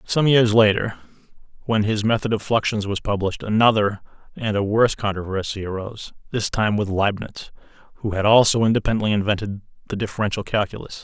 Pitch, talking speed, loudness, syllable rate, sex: 105 Hz, 145 wpm, -21 LUFS, 6.0 syllables/s, male